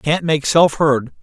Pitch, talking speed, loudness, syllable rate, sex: 150 Hz, 195 wpm, -15 LUFS, 3.6 syllables/s, male